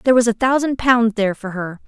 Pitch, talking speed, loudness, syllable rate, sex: 230 Hz, 255 wpm, -17 LUFS, 6.1 syllables/s, female